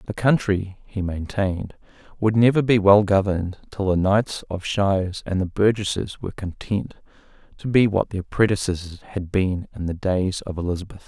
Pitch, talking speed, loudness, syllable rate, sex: 95 Hz, 170 wpm, -22 LUFS, 4.9 syllables/s, male